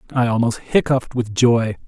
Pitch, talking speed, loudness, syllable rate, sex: 120 Hz, 160 wpm, -18 LUFS, 5.3 syllables/s, male